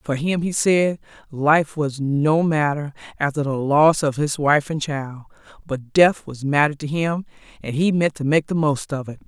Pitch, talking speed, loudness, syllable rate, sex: 150 Hz, 200 wpm, -20 LUFS, 4.4 syllables/s, female